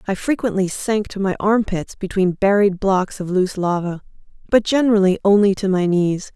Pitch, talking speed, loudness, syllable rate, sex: 195 Hz, 170 wpm, -18 LUFS, 5.1 syllables/s, female